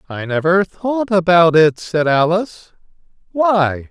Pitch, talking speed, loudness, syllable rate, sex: 180 Hz, 125 wpm, -15 LUFS, 3.9 syllables/s, male